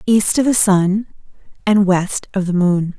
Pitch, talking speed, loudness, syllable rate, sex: 195 Hz, 180 wpm, -16 LUFS, 3.9 syllables/s, female